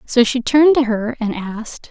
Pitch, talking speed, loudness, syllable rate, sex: 240 Hz, 220 wpm, -16 LUFS, 5.0 syllables/s, female